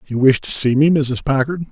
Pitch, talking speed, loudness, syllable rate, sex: 140 Hz, 245 wpm, -16 LUFS, 5.2 syllables/s, male